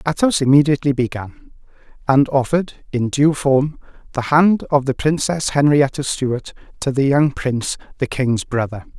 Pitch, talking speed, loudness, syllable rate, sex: 140 Hz, 145 wpm, -18 LUFS, 4.8 syllables/s, male